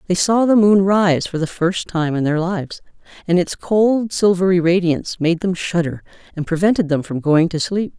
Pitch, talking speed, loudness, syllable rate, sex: 180 Hz, 205 wpm, -17 LUFS, 5.0 syllables/s, female